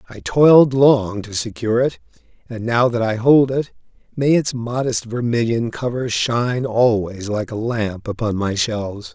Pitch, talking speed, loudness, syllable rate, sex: 115 Hz, 165 wpm, -18 LUFS, 4.5 syllables/s, male